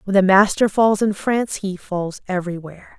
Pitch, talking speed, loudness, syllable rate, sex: 195 Hz, 180 wpm, -19 LUFS, 5.3 syllables/s, female